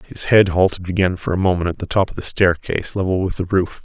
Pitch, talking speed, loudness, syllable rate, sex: 90 Hz, 265 wpm, -18 LUFS, 6.2 syllables/s, male